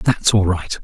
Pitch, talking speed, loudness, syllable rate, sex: 100 Hz, 215 wpm, -17 LUFS, 3.9 syllables/s, male